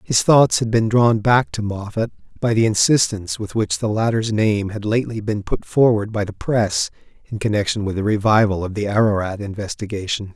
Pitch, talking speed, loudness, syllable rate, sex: 105 Hz, 190 wpm, -19 LUFS, 5.3 syllables/s, male